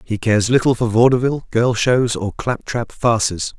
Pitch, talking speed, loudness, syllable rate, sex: 115 Hz, 185 wpm, -17 LUFS, 4.9 syllables/s, male